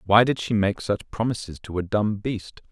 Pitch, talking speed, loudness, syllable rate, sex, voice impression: 105 Hz, 220 wpm, -24 LUFS, 5.0 syllables/s, male, very masculine, adult-like, slightly thick, slightly dark, cool, slightly intellectual, slightly calm